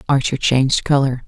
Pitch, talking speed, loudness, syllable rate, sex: 135 Hz, 140 wpm, -17 LUFS, 5.6 syllables/s, female